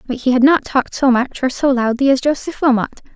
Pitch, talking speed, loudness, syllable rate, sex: 260 Hz, 245 wpm, -16 LUFS, 6.1 syllables/s, female